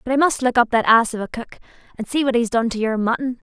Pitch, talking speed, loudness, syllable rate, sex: 240 Hz, 305 wpm, -19 LUFS, 6.8 syllables/s, female